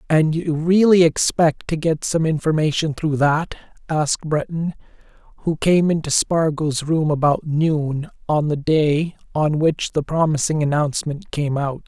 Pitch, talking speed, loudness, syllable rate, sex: 155 Hz, 145 wpm, -19 LUFS, 4.3 syllables/s, male